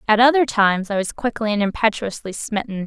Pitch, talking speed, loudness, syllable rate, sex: 215 Hz, 190 wpm, -19 LUFS, 5.9 syllables/s, female